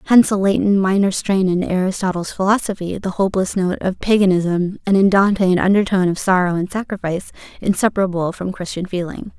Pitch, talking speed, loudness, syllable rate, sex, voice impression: 190 Hz, 165 wpm, -18 LUFS, 6.1 syllables/s, female, very feminine, slightly young, slightly adult-like, very thin, slightly relaxed, slightly weak, bright, soft, clear, slightly fluent, slightly raspy, very cute, intellectual, refreshing, sincere, calm, very friendly, very reassuring, unique, elegant, wild, very sweet, slightly lively, kind, modest